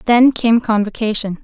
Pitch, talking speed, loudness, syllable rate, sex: 225 Hz, 125 wpm, -15 LUFS, 4.7 syllables/s, female